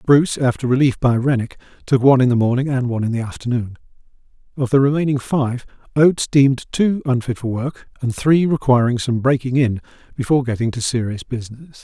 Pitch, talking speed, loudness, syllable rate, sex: 130 Hz, 180 wpm, -18 LUFS, 6.0 syllables/s, male